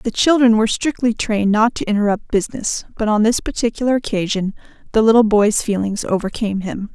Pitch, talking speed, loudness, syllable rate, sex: 220 Hz, 175 wpm, -17 LUFS, 6.0 syllables/s, female